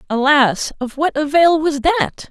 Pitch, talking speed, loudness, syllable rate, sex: 295 Hz, 155 wpm, -16 LUFS, 3.9 syllables/s, female